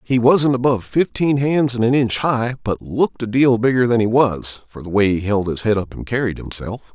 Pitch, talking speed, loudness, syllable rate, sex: 120 Hz, 240 wpm, -18 LUFS, 5.3 syllables/s, male